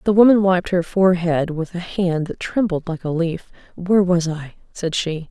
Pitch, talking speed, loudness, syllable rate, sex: 175 Hz, 205 wpm, -19 LUFS, 4.8 syllables/s, female